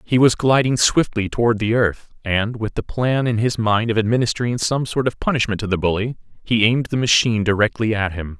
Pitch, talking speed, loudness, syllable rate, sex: 115 Hz, 215 wpm, -19 LUFS, 5.7 syllables/s, male